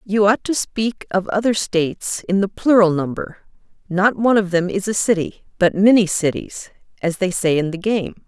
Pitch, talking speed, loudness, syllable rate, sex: 195 Hz, 195 wpm, -18 LUFS, 4.9 syllables/s, female